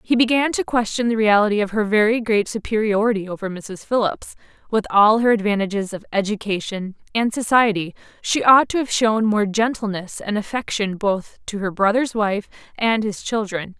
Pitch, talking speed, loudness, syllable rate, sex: 215 Hz, 170 wpm, -20 LUFS, 5.1 syllables/s, female